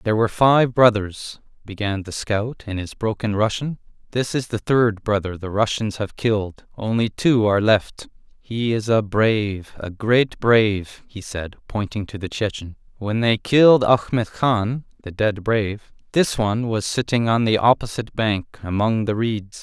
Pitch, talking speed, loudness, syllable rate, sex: 110 Hz, 170 wpm, -20 LUFS, 4.5 syllables/s, male